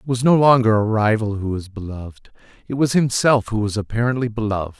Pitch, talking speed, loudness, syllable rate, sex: 115 Hz, 200 wpm, -18 LUFS, 5.9 syllables/s, male